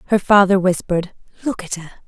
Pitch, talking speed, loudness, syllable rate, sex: 190 Hz, 175 wpm, -17 LUFS, 6.5 syllables/s, female